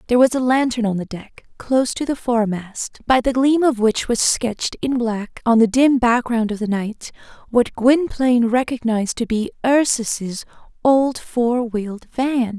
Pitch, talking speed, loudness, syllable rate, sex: 240 Hz, 175 wpm, -19 LUFS, 4.6 syllables/s, female